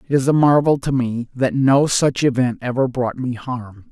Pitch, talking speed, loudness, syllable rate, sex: 130 Hz, 215 wpm, -18 LUFS, 4.6 syllables/s, male